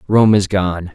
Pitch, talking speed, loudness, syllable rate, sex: 95 Hz, 190 wpm, -15 LUFS, 3.8 syllables/s, male